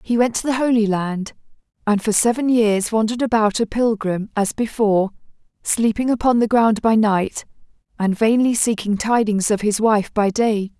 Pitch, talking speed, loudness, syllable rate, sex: 220 Hz, 170 wpm, -18 LUFS, 4.9 syllables/s, female